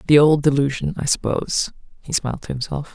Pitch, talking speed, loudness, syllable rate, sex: 140 Hz, 185 wpm, -20 LUFS, 6.1 syllables/s, female